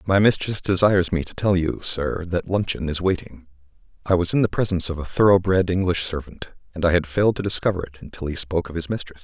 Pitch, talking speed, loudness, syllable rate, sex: 90 Hz, 220 wpm, -22 LUFS, 6.4 syllables/s, male